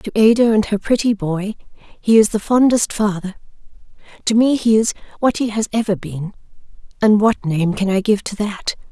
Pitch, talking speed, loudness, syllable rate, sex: 210 Hz, 190 wpm, -17 LUFS, 4.9 syllables/s, female